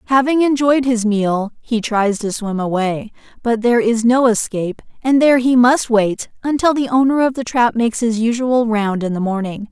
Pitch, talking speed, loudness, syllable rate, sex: 235 Hz, 200 wpm, -16 LUFS, 5.0 syllables/s, female